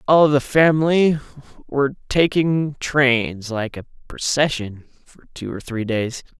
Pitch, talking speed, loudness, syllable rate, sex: 135 Hz, 130 wpm, -19 LUFS, 4.0 syllables/s, male